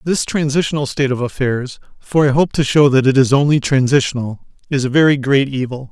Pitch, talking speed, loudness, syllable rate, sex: 135 Hz, 205 wpm, -15 LUFS, 3.8 syllables/s, male